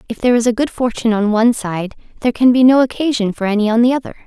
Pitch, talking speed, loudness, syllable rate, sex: 235 Hz, 265 wpm, -15 LUFS, 7.6 syllables/s, female